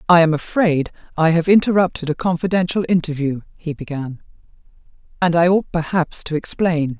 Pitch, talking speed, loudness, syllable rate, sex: 165 Hz, 145 wpm, -18 LUFS, 5.3 syllables/s, female